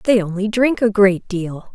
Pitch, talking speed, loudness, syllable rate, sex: 205 Hz, 205 wpm, -17 LUFS, 4.2 syllables/s, female